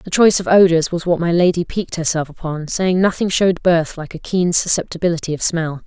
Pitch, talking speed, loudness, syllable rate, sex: 170 Hz, 215 wpm, -17 LUFS, 5.8 syllables/s, female